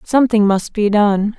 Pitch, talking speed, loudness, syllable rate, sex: 210 Hz, 175 wpm, -15 LUFS, 4.7 syllables/s, female